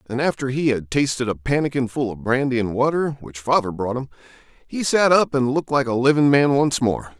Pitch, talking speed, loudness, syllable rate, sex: 130 Hz, 225 wpm, -20 LUFS, 5.6 syllables/s, male